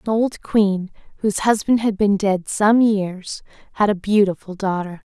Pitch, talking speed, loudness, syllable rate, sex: 205 Hz, 165 wpm, -19 LUFS, 4.5 syllables/s, female